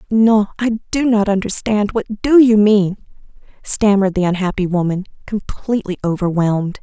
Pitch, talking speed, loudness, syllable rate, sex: 205 Hz, 130 wpm, -16 LUFS, 5.0 syllables/s, female